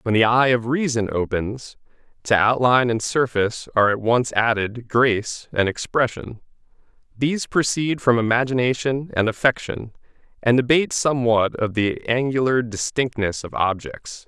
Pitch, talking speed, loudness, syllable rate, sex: 120 Hz, 135 wpm, -20 LUFS, 4.9 syllables/s, male